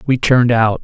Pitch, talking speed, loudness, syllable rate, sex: 120 Hz, 215 wpm, -13 LUFS, 5.8 syllables/s, male